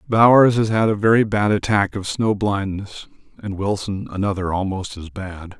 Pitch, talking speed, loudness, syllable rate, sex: 100 Hz, 170 wpm, -19 LUFS, 4.8 syllables/s, male